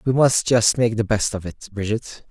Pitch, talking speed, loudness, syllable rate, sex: 115 Hz, 235 wpm, -20 LUFS, 4.7 syllables/s, male